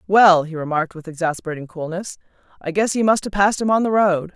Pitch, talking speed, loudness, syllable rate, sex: 185 Hz, 220 wpm, -19 LUFS, 6.4 syllables/s, female